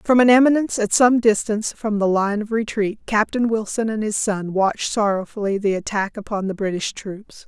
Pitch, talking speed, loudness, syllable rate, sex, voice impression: 215 Hz, 195 wpm, -20 LUFS, 5.3 syllables/s, female, feminine, very adult-like, slightly muffled, slightly calm, slightly elegant